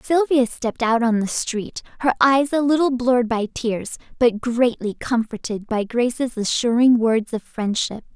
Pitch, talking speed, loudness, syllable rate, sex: 240 Hz, 160 wpm, -20 LUFS, 4.4 syllables/s, female